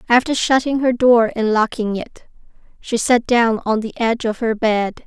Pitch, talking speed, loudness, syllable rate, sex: 230 Hz, 190 wpm, -17 LUFS, 4.7 syllables/s, female